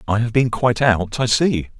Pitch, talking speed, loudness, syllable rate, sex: 115 Hz, 235 wpm, -18 LUFS, 5.1 syllables/s, male